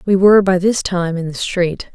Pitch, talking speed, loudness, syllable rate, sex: 185 Hz, 245 wpm, -15 LUFS, 4.9 syllables/s, female